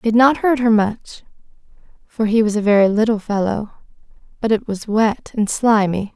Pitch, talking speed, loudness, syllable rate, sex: 215 Hz, 185 wpm, -17 LUFS, 5.0 syllables/s, female